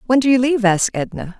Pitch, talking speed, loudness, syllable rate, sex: 230 Hz, 260 wpm, -17 LUFS, 7.6 syllables/s, female